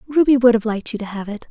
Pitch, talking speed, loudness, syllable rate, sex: 230 Hz, 320 wpm, -17 LUFS, 7.3 syllables/s, female